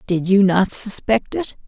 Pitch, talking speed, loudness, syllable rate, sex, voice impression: 200 Hz, 180 wpm, -18 LUFS, 4.1 syllables/s, female, feminine, slightly adult-like, slightly cute, friendly, slightly unique